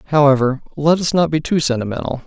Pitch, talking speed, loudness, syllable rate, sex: 145 Hz, 185 wpm, -17 LUFS, 6.4 syllables/s, male